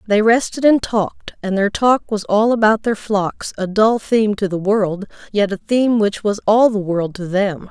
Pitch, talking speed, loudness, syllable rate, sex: 210 Hz, 220 wpm, -17 LUFS, 4.6 syllables/s, female